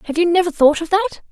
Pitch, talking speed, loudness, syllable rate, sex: 330 Hz, 275 wpm, -16 LUFS, 8.3 syllables/s, female